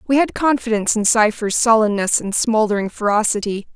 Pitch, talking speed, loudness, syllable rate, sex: 220 Hz, 145 wpm, -17 LUFS, 5.7 syllables/s, female